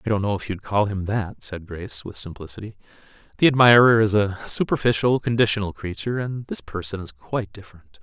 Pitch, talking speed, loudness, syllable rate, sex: 105 Hz, 195 wpm, -22 LUFS, 6.3 syllables/s, male